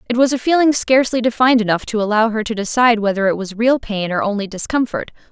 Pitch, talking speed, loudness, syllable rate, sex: 225 Hz, 225 wpm, -17 LUFS, 6.7 syllables/s, female